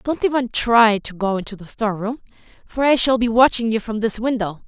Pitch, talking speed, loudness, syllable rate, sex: 225 Hz, 220 wpm, -19 LUFS, 5.6 syllables/s, female